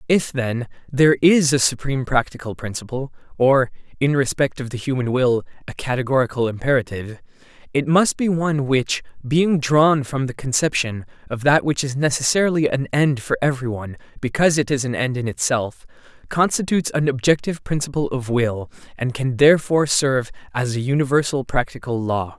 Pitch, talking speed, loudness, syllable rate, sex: 135 Hz, 160 wpm, -20 LUFS, 5.6 syllables/s, male